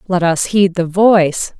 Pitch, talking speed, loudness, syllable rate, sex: 180 Hz, 190 wpm, -13 LUFS, 4.3 syllables/s, female